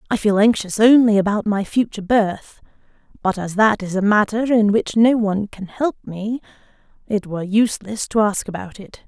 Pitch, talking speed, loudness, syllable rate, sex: 210 Hz, 185 wpm, -18 LUFS, 5.2 syllables/s, female